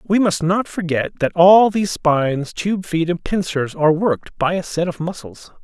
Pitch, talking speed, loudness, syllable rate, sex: 170 Hz, 200 wpm, -18 LUFS, 4.7 syllables/s, male